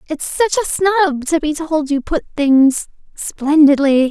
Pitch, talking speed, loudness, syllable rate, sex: 305 Hz, 160 wpm, -15 LUFS, 4.2 syllables/s, female